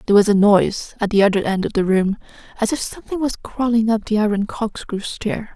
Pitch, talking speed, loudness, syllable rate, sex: 215 Hz, 225 wpm, -19 LUFS, 6.0 syllables/s, female